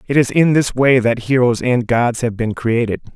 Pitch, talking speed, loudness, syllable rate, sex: 120 Hz, 230 wpm, -16 LUFS, 4.6 syllables/s, male